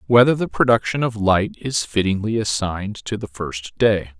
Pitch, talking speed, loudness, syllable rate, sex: 105 Hz, 170 wpm, -20 LUFS, 4.9 syllables/s, male